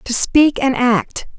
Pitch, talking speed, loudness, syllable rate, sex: 260 Hz, 175 wpm, -14 LUFS, 3.2 syllables/s, female